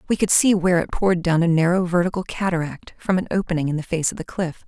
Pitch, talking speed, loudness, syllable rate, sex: 175 Hz, 255 wpm, -21 LUFS, 6.6 syllables/s, female